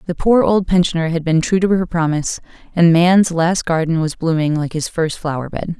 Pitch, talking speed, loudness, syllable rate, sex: 170 Hz, 215 wpm, -16 LUFS, 5.3 syllables/s, female